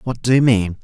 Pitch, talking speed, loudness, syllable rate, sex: 115 Hz, 285 wpm, -16 LUFS, 5.7 syllables/s, male